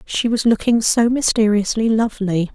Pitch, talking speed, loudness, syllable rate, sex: 220 Hz, 140 wpm, -17 LUFS, 4.9 syllables/s, female